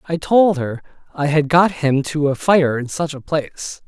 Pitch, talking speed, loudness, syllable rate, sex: 150 Hz, 215 wpm, -17 LUFS, 4.5 syllables/s, male